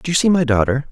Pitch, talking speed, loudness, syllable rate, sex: 145 Hz, 330 wpm, -16 LUFS, 7.3 syllables/s, male